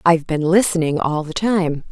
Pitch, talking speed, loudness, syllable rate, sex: 170 Hz, 190 wpm, -18 LUFS, 5.1 syllables/s, female